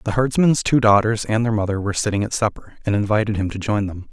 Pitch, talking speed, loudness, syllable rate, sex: 105 Hz, 250 wpm, -19 LUFS, 6.4 syllables/s, male